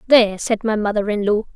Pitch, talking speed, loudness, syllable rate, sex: 215 Hz, 230 wpm, -18 LUFS, 6.1 syllables/s, female